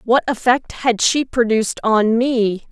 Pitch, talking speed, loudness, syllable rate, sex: 235 Hz, 155 wpm, -17 LUFS, 4.0 syllables/s, female